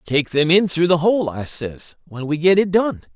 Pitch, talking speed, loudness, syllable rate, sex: 165 Hz, 250 wpm, -18 LUFS, 4.5 syllables/s, male